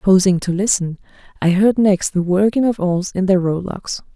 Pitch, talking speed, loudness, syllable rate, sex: 190 Hz, 190 wpm, -17 LUFS, 4.8 syllables/s, female